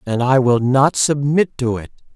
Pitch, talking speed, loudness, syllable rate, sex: 130 Hz, 195 wpm, -16 LUFS, 4.4 syllables/s, male